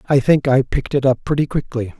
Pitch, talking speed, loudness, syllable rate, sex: 135 Hz, 240 wpm, -17 LUFS, 6.3 syllables/s, male